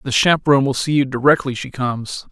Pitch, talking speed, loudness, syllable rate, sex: 135 Hz, 210 wpm, -17 LUFS, 6.4 syllables/s, male